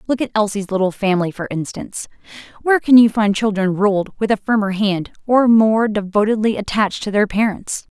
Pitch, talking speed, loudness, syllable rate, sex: 210 Hz, 180 wpm, -17 LUFS, 5.6 syllables/s, female